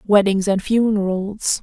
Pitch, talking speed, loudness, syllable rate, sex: 200 Hz, 110 wpm, -18 LUFS, 4.0 syllables/s, female